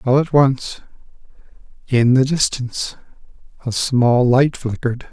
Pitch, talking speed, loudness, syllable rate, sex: 130 Hz, 115 wpm, -17 LUFS, 4.3 syllables/s, male